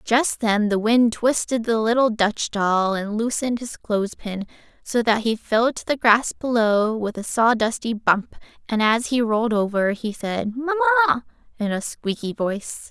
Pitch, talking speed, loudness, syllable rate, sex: 225 Hz, 175 wpm, -21 LUFS, 4.5 syllables/s, female